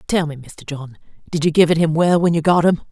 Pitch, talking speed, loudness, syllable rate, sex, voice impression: 160 Hz, 290 wpm, -16 LUFS, 6.0 syllables/s, female, very feminine, adult-like, slightly fluent, intellectual, slightly calm